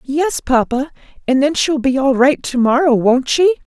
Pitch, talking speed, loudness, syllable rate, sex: 265 Hz, 190 wpm, -15 LUFS, 4.4 syllables/s, female